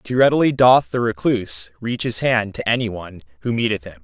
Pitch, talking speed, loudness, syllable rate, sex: 110 Hz, 210 wpm, -19 LUFS, 5.7 syllables/s, male